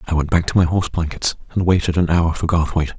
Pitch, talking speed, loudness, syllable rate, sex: 85 Hz, 260 wpm, -18 LUFS, 6.7 syllables/s, male